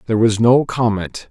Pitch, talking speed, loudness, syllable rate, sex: 115 Hz, 185 wpm, -16 LUFS, 5.2 syllables/s, male